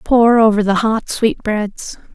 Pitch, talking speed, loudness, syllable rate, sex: 215 Hz, 140 wpm, -15 LUFS, 3.7 syllables/s, female